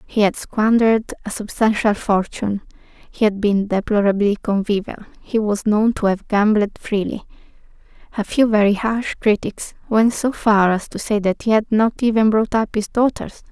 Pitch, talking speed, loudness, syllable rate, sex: 215 Hz, 170 wpm, -18 LUFS, 4.9 syllables/s, female